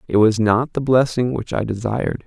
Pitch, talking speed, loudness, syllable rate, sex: 115 Hz, 210 wpm, -19 LUFS, 5.2 syllables/s, male